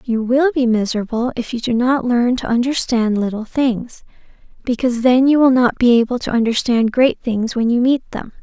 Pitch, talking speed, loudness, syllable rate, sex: 240 Hz, 200 wpm, -16 LUFS, 5.1 syllables/s, female